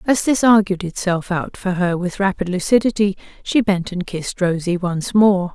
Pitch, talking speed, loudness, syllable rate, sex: 190 Hz, 185 wpm, -18 LUFS, 4.8 syllables/s, female